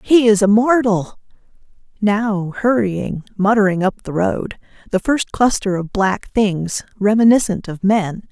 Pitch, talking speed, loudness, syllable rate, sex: 205 Hz, 130 wpm, -17 LUFS, 4.0 syllables/s, female